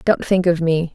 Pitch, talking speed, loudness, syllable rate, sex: 170 Hz, 255 wpm, -18 LUFS, 4.7 syllables/s, female